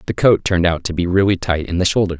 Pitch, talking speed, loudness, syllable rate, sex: 90 Hz, 330 wpm, -17 LUFS, 7.3 syllables/s, male